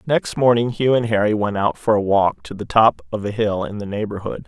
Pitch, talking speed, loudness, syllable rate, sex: 110 Hz, 255 wpm, -19 LUFS, 5.4 syllables/s, male